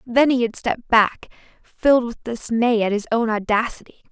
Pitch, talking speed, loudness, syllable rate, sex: 230 Hz, 175 wpm, -20 LUFS, 5.1 syllables/s, female